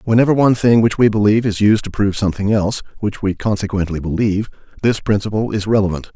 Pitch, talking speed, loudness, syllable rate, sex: 105 Hz, 195 wpm, -16 LUFS, 6.9 syllables/s, male